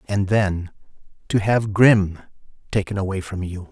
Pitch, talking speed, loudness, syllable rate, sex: 100 Hz, 130 wpm, -21 LUFS, 4.3 syllables/s, male